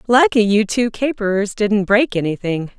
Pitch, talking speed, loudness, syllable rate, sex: 215 Hz, 150 wpm, -17 LUFS, 4.7 syllables/s, female